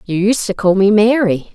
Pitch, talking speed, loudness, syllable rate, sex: 205 Hz, 235 wpm, -13 LUFS, 4.8 syllables/s, female